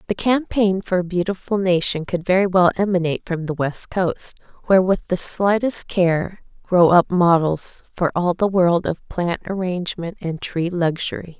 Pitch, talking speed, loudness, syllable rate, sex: 180 Hz, 170 wpm, -20 LUFS, 4.6 syllables/s, female